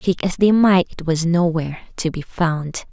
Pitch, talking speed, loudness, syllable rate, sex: 170 Hz, 205 wpm, -19 LUFS, 4.6 syllables/s, female